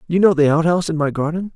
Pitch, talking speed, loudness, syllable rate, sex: 165 Hz, 310 wpm, -17 LUFS, 7.2 syllables/s, male